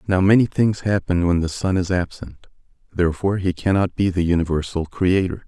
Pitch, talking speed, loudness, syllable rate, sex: 90 Hz, 175 wpm, -20 LUFS, 5.6 syllables/s, male